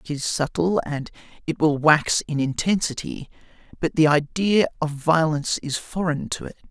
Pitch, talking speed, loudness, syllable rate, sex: 155 Hz, 160 wpm, -22 LUFS, 4.9 syllables/s, male